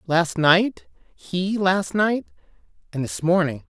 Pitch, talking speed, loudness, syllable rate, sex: 180 Hz, 110 wpm, -21 LUFS, 3.5 syllables/s, female